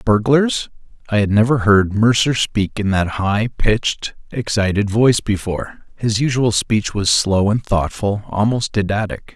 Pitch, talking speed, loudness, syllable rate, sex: 110 Hz, 145 wpm, -17 LUFS, 4.3 syllables/s, male